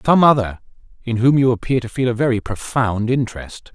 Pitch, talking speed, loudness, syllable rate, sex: 120 Hz, 190 wpm, -18 LUFS, 5.6 syllables/s, male